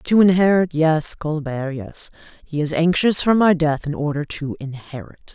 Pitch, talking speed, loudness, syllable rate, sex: 160 Hz, 170 wpm, -19 LUFS, 4.5 syllables/s, female